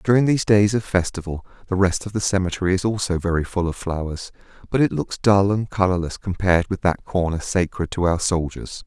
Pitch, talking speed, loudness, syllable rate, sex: 95 Hz, 205 wpm, -21 LUFS, 5.7 syllables/s, male